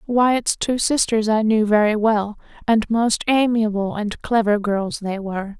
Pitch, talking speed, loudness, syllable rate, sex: 220 Hz, 160 wpm, -19 LUFS, 4.1 syllables/s, female